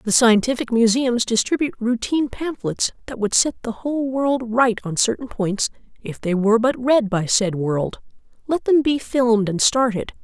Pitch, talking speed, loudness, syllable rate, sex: 235 Hz, 175 wpm, -20 LUFS, 4.9 syllables/s, female